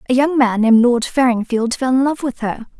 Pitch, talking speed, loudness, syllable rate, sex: 250 Hz, 235 wpm, -16 LUFS, 5.6 syllables/s, female